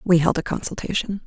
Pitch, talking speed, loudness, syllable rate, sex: 175 Hz, 190 wpm, -23 LUFS, 6.0 syllables/s, female